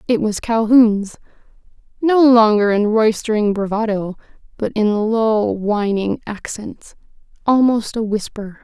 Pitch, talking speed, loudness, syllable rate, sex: 220 Hz, 105 wpm, -17 LUFS, 3.9 syllables/s, female